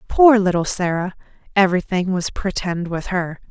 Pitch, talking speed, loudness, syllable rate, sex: 185 Hz, 135 wpm, -19 LUFS, 4.8 syllables/s, female